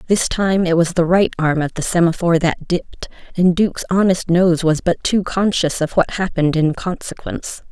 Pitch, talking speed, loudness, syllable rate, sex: 175 Hz, 185 wpm, -17 LUFS, 5.2 syllables/s, female